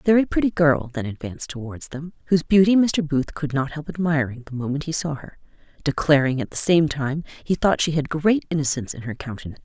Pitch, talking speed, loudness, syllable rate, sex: 150 Hz, 220 wpm, -22 LUFS, 6.1 syllables/s, female